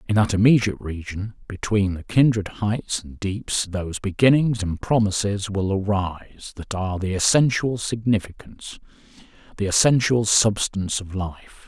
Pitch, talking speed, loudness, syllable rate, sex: 105 Hz, 135 wpm, -22 LUFS, 4.8 syllables/s, male